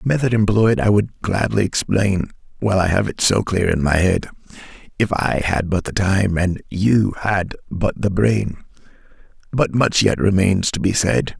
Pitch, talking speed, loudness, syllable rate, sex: 100 Hz, 185 wpm, -18 LUFS, 4.5 syllables/s, male